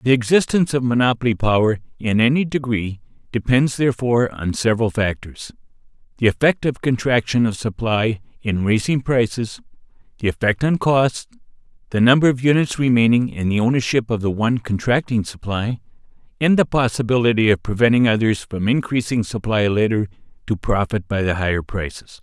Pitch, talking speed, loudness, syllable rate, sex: 115 Hz, 150 wpm, -19 LUFS, 5.5 syllables/s, male